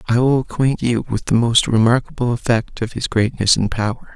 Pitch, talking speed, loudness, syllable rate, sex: 120 Hz, 200 wpm, -18 LUFS, 5.3 syllables/s, male